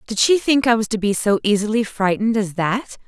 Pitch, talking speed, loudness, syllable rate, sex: 220 Hz, 235 wpm, -18 LUFS, 5.7 syllables/s, female